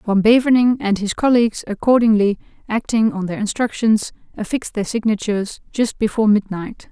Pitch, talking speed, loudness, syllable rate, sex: 220 Hz, 140 wpm, -18 LUFS, 5.6 syllables/s, female